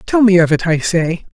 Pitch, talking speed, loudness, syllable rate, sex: 175 Hz, 265 wpm, -14 LUFS, 5.1 syllables/s, male